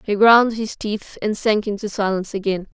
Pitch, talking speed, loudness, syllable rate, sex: 210 Hz, 195 wpm, -19 LUFS, 5.0 syllables/s, female